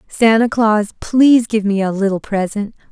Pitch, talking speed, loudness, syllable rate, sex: 215 Hz, 165 wpm, -15 LUFS, 4.8 syllables/s, female